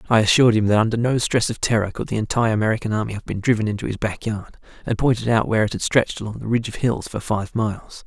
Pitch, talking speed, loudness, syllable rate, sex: 110 Hz, 270 wpm, -21 LUFS, 7.1 syllables/s, male